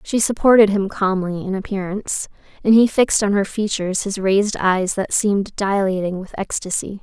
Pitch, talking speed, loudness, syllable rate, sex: 200 Hz, 170 wpm, -19 LUFS, 5.4 syllables/s, female